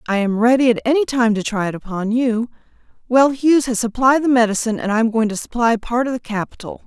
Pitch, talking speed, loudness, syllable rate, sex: 235 Hz, 235 wpm, -17 LUFS, 6.3 syllables/s, female